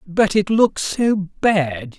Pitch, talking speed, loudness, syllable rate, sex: 190 Hz, 150 wpm, -18 LUFS, 2.7 syllables/s, male